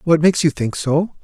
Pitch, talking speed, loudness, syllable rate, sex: 160 Hz, 240 wpm, -17 LUFS, 5.5 syllables/s, male